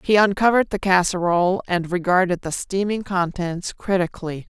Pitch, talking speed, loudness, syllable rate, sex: 185 Hz, 130 wpm, -21 LUFS, 5.3 syllables/s, female